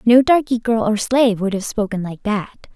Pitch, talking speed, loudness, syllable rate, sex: 220 Hz, 220 wpm, -18 LUFS, 5.0 syllables/s, female